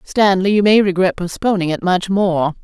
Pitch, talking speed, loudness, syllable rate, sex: 190 Hz, 180 wpm, -15 LUFS, 4.8 syllables/s, female